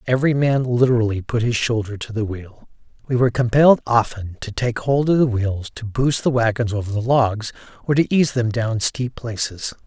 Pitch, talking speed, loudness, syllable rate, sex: 120 Hz, 200 wpm, -20 LUFS, 5.2 syllables/s, male